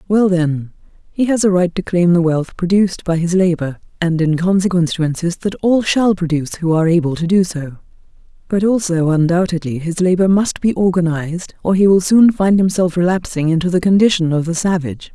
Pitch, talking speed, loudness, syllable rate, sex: 175 Hz, 200 wpm, -15 LUFS, 5.7 syllables/s, female